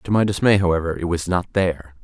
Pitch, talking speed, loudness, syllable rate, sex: 90 Hz, 235 wpm, -20 LUFS, 6.5 syllables/s, male